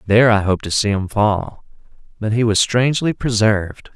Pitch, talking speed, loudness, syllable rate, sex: 110 Hz, 180 wpm, -17 LUFS, 5.5 syllables/s, male